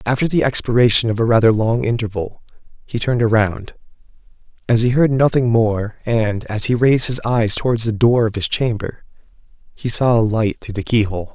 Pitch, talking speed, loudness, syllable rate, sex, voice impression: 115 Hz, 185 wpm, -17 LUFS, 5.4 syllables/s, male, masculine, very adult-like, middle-aged, thick, slightly tensed, slightly weak, slightly bright, slightly hard, slightly muffled, fluent, slightly raspy, very cool, intellectual, refreshing, very sincere, calm, mature, friendly, reassuring, slightly unique, wild, sweet, slightly lively, kind, slightly modest